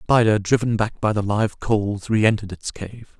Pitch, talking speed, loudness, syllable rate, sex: 105 Hz, 205 wpm, -21 LUFS, 5.1 syllables/s, male